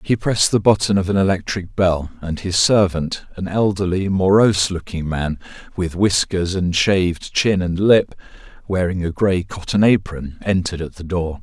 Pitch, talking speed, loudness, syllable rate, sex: 90 Hz, 170 wpm, -18 LUFS, 4.8 syllables/s, male